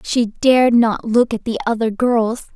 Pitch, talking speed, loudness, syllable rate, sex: 230 Hz, 190 wpm, -16 LUFS, 4.3 syllables/s, female